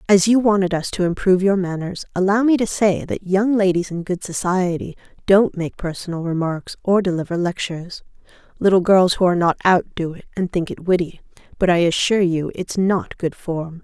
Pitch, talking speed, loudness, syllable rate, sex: 185 Hz, 195 wpm, -19 LUFS, 5.5 syllables/s, female